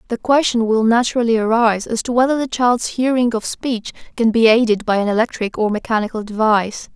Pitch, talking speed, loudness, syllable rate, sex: 230 Hz, 190 wpm, -17 LUFS, 5.8 syllables/s, female